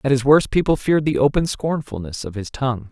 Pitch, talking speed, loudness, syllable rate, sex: 135 Hz, 225 wpm, -19 LUFS, 6.1 syllables/s, male